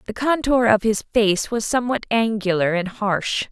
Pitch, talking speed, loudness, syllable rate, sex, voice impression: 220 Hz, 170 wpm, -20 LUFS, 4.7 syllables/s, female, very feminine, slightly young, slightly adult-like, very thin, tensed, slightly powerful, very bright, hard, very clear, fluent, cool, very intellectual, very refreshing, sincere, very calm, very friendly, reassuring, slightly unique, very elegant, slightly sweet, very lively, kind